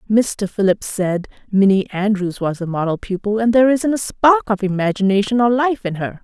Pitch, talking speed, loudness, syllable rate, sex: 210 Hz, 195 wpm, -17 LUFS, 5.2 syllables/s, female